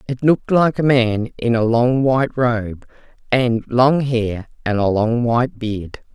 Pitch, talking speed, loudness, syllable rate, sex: 120 Hz, 175 wpm, -18 LUFS, 4.0 syllables/s, female